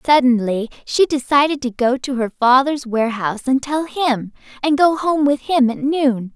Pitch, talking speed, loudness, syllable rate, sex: 265 Hz, 180 wpm, -17 LUFS, 4.8 syllables/s, female